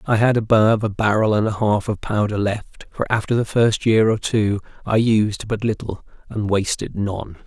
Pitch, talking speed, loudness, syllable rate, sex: 105 Hz, 200 wpm, -20 LUFS, 4.7 syllables/s, male